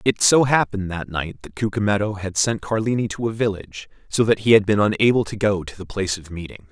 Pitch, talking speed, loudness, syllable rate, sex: 100 Hz, 230 wpm, -20 LUFS, 6.1 syllables/s, male